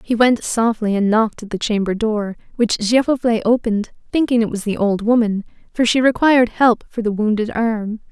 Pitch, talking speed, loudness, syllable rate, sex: 225 Hz, 190 wpm, -17 LUFS, 5.3 syllables/s, female